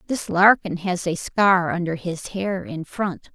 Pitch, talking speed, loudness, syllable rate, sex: 180 Hz, 180 wpm, -21 LUFS, 3.8 syllables/s, female